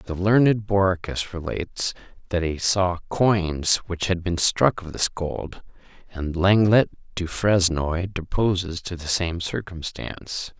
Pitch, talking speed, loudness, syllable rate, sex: 90 Hz, 135 wpm, -23 LUFS, 3.9 syllables/s, male